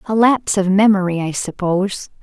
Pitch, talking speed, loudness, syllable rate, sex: 195 Hz, 160 wpm, -16 LUFS, 5.5 syllables/s, female